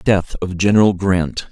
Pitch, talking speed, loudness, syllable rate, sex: 95 Hz, 160 wpm, -16 LUFS, 4.4 syllables/s, male